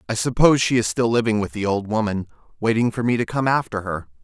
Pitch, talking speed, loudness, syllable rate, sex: 110 Hz, 240 wpm, -21 LUFS, 6.4 syllables/s, male